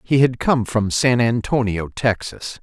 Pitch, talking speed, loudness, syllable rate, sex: 115 Hz, 160 wpm, -19 LUFS, 4.1 syllables/s, male